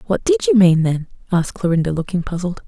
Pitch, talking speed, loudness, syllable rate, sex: 170 Hz, 200 wpm, -17 LUFS, 6.2 syllables/s, female